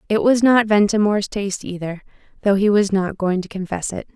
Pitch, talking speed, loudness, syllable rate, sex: 200 Hz, 200 wpm, -19 LUFS, 5.7 syllables/s, female